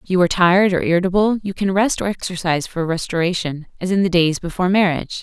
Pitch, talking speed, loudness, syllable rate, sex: 180 Hz, 220 wpm, -18 LUFS, 6.9 syllables/s, female